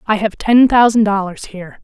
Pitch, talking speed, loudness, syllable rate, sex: 210 Hz, 195 wpm, -13 LUFS, 5.3 syllables/s, female